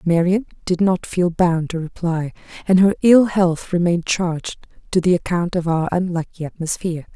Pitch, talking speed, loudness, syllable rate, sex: 175 Hz, 170 wpm, -19 LUFS, 5.0 syllables/s, female